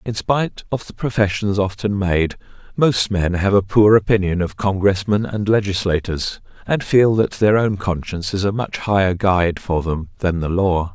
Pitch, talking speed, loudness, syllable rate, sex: 100 Hz, 180 wpm, -18 LUFS, 4.8 syllables/s, male